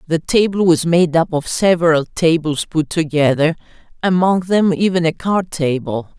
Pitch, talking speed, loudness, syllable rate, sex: 165 Hz, 155 wpm, -16 LUFS, 4.7 syllables/s, female